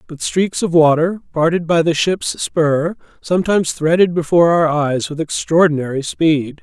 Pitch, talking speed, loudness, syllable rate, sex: 160 Hz, 155 wpm, -16 LUFS, 4.8 syllables/s, male